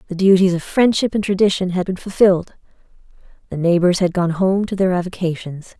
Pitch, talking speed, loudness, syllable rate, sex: 185 Hz, 175 wpm, -17 LUFS, 5.8 syllables/s, female